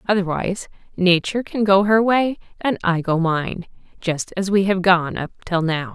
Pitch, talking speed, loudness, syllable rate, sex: 185 Hz, 180 wpm, -19 LUFS, 4.8 syllables/s, female